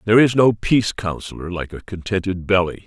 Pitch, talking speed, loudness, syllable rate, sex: 100 Hz, 190 wpm, -19 LUFS, 5.9 syllables/s, male